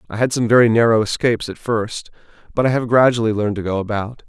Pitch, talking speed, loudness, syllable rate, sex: 115 Hz, 225 wpm, -17 LUFS, 6.6 syllables/s, male